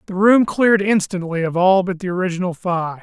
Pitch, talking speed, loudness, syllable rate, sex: 185 Hz, 200 wpm, -17 LUFS, 5.6 syllables/s, male